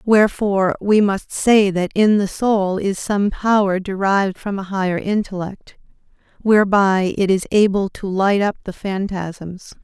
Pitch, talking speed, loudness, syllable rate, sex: 195 Hz, 155 wpm, -18 LUFS, 4.3 syllables/s, female